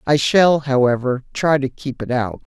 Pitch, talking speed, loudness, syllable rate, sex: 135 Hz, 190 wpm, -18 LUFS, 4.6 syllables/s, male